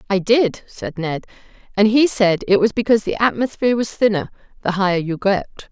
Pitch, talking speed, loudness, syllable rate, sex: 205 Hz, 190 wpm, -18 LUFS, 5.7 syllables/s, female